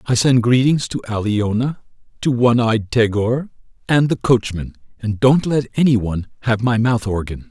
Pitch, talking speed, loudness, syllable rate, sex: 120 Hz, 170 wpm, -18 LUFS, 5.0 syllables/s, male